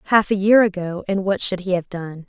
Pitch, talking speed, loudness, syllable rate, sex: 190 Hz, 265 wpm, -19 LUFS, 5.5 syllables/s, female